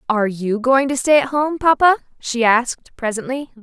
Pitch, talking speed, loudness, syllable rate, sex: 255 Hz, 180 wpm, -17 LUFS, 5.1 syllables/s, female